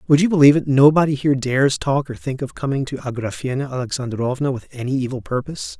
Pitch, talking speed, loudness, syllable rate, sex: 135 Hz, 195 wpm, -19 LUFS, 6.7 syllables/s, male